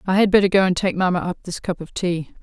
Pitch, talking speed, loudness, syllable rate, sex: 185 Hz, 295 wpm, -20 LUFS, 6.4 syllables/s, female